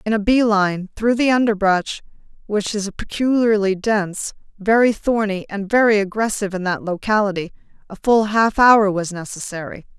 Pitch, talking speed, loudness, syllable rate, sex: 205 Hz, 150 wpm, -18 LUFS, 5.0 syllables/s, female